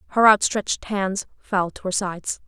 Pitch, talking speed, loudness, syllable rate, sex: 195 Hz, 170 wpm, -22 LUFS, 5.0 syllables/s, female